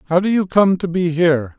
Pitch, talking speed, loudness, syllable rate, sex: 175 Hz, 265 wpm, -16 LUFS, 5.8 syllables/s, male